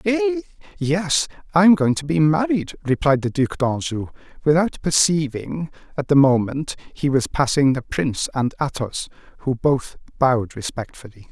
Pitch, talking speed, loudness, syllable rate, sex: 145 Hz, 150 wpm, -20 LUFS, 4.7 syllables/s, male